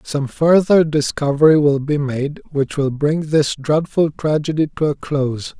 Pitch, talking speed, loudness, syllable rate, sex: 150 Hz, 160 wpm, -17 LUFS, 4.3 syllables/s, male